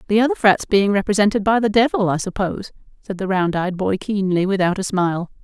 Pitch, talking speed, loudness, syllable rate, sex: 200 Hz, 210 wpm, -18 LUFS, 6.0 syllables/s, female